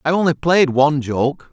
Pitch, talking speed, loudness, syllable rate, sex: 150 Hz, 195 wpm, -16 LUFS, 5.1 syllables/s, male